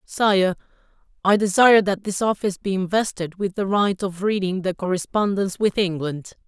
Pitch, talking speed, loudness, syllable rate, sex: 195 Hz, 160 wpm, -21 LUFS, 5.2 syllables/s, male